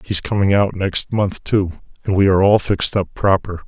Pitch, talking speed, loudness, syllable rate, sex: 95 Hz, 210 wpm, -17 LUFS, 5.4 syllables/s, male